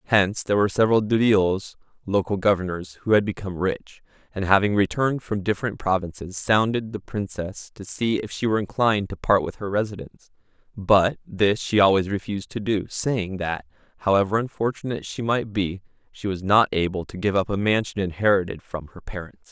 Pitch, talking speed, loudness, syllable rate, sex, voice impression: 100 Hz, 180 wpm, -23 LUFS, 5.6 syllables/s, male, very masculine, very adult-like, middle-aged, thick, slightly relaxed, weak, dark, very soft, muffled, slightly halting, very cool, intellectual, slightly refreshing, very sincere, very calm, mature, very friendly, very reassuring, slightly unique, elegant, wild, very sweet, lively, very kind, slightly modest